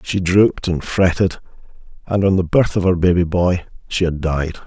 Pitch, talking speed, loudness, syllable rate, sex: 90 Hz, 195 wpm, -17 LUFS, 5.1 syllables/s, male